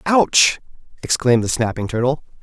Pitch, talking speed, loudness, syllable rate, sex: 130 Hz, 125 wpm, -17 LUFS, 5.2 syllables/s, male